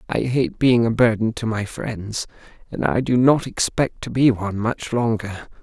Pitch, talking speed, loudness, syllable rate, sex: 115 Hz, 190 wpm, -20 LUFS, 4.7 syllables/s, male